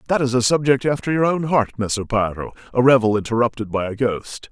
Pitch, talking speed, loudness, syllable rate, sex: 120 Hz, 200 wpm, -19 LUFS, 5.9 syllables/s, male